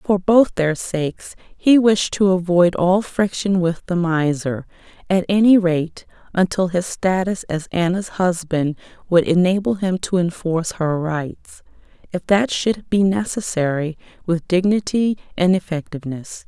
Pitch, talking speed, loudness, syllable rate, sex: 180 Hz, 140 wpm, -19 LUFS, 4.2 syllables/s, female